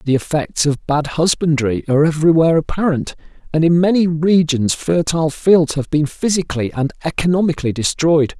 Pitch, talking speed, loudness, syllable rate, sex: 155 Hz, 145 wpm, -16 LUFS, 5.6 syllables/s, male